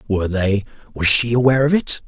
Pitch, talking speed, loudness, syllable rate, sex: 115 Hz, 145 wpm, -16 LUFS, 6.2 syllables/s, male